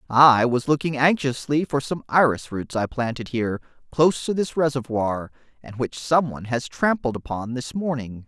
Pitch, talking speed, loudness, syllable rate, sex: 130 Hz, 175 wpm, -22 LUFS, 5.0 syllables/s, male